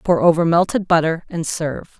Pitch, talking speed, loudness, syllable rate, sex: 165 Hz, 180 wpm, -18 LUFS, 5.4 syllables/s, female